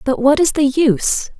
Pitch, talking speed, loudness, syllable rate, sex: 280 Hz, 215 wpm, -15 LUFS, 4.8 syllables/s, female